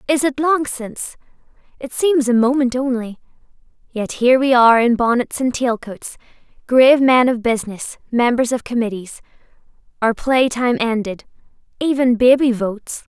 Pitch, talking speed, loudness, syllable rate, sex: 250 Hz, 140 wpm, -16 LUFS, 5.0 syllables/s, female